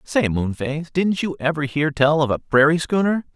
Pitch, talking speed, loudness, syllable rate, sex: 150 Hz, 215 wpm, -20 LUFS, 4.7 syllables/s, male